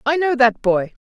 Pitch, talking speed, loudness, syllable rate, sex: 245 Hz, 235 wpm, -17 LUFS, 4.7 syllables/s, female